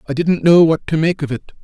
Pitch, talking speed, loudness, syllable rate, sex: 160 Hz, 295 wpm, -15 LUFS, 5.8 syllables/s, male